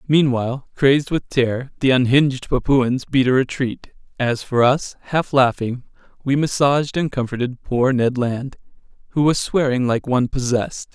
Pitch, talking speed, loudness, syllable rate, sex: 130 Hz, 155 wpm, -19 LUFS, 5.0 syllables/s, male